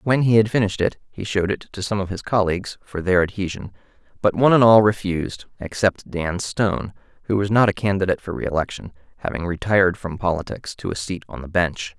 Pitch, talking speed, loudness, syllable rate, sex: 95 Hz, 205 wpm, -21 LUFS, 6.0 syllables/s, male